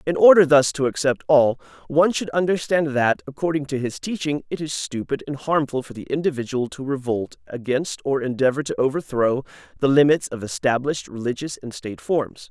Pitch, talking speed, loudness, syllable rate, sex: 135 Hz, 180 wpm, -21 LUFS, 5.5 syllables/s, male